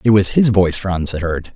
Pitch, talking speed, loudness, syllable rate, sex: 95 Hz, 270 wpm, -16 LUFS, 5.5 syllables/s, male